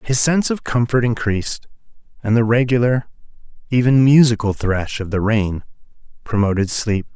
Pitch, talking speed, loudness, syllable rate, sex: 115 Hz, 135 wpm, -17 LUFS, 5.2 syllables/s, male